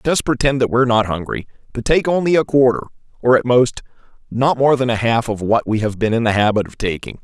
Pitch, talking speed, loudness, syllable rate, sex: 120 Hz, 240 wpm, -17 LUFS, 6.0 syllables/s, male